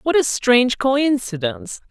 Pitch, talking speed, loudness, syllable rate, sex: 235 Hz, 125 wpm, -18 LUFS, 4.6 syllables/s, male